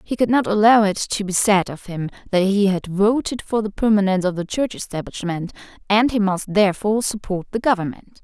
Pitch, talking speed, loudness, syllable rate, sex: 205 Hz, 205 wpm, -19 LUFS, 5.6 syllables/s, female